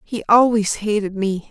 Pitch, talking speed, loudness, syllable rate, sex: 210 Hz, 160 wpm, -18 LUFS, 4.4 syllables/s, female